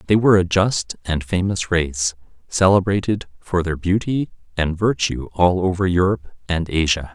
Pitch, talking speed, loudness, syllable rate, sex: 90 Hz, 150 wpm, -20 LUFS, 4.8 syllables/s, male